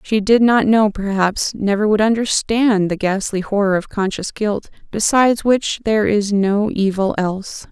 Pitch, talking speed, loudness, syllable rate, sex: 205 Hz, 165 wpm, -17 LUFS, 4.5 syllables/s, female